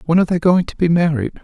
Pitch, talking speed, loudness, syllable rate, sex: 165 Hz, 290 wpm, -16 LUFS, 7.5 syllables/s, male